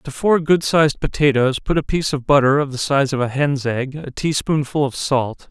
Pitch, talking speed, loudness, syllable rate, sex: 140 Hz, 240 wpm, -18 LUFS, 5.2 syllables/s, male